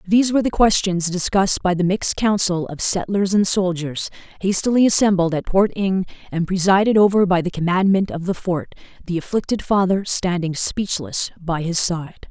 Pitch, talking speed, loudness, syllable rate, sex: 185 Hz, 165 wpm, -19 LUFS, 5.3 syllables/s, female